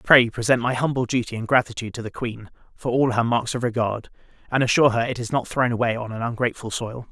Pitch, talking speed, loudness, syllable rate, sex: 120 Hz, 235 wpm, -22 LUFS, 6.5 syllables/s, male